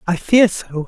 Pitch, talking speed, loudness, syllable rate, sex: 185 Hz, 205 wpm, -15 LUFS, 4.1 syllables/s, male